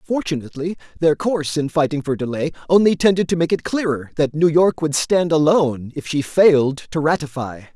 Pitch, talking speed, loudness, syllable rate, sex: 155 Hz, 185 wpm, -18 LUFS, 5.5 syllables/s, male